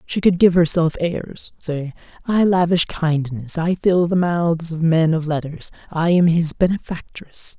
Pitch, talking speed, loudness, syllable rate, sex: 165 Hz, 165 wpm, -19 LUFS, 4.1 syllables/s, male